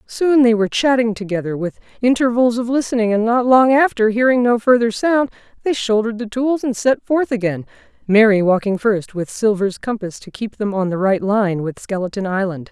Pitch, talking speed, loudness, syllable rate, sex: 220 Hz, 195 wpm, -17 LUFS, 5.3 syllables/s, female